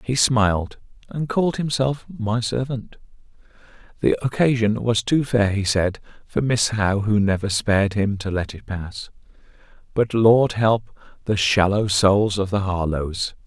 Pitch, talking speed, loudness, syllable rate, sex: 110 Hz, 145 wpm, -21 LUFS, 4.4 syllables/s, male